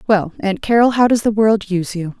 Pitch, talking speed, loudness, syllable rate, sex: 205 Hz, 245 wpm, -16 LUFS, 5.6 syllables/s, female